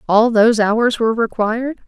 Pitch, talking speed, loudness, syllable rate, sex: 225 Hz, 160 wpm, -15 LUFS, 5.4 syllables/s, female